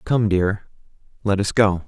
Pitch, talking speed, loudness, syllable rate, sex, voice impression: 100 Hz, 160 wpm, -20 LUFS, 4.0 syllables/s, male, very masculine, very adult-like, middle-aged, thick, slightly tensed, powerful, slightly dark, slightly hard, clear, fluent, slightly raspy, very cool, very intellectual, sincere, very calm, very mature, friendly, reassuring, very unique, elegant, wild, very sweet, lively, very kind, modest